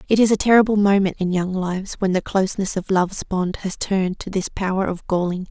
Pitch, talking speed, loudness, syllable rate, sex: 190 Hz, 230 wpm, -20 LUFS, 5.9 syllables/s, female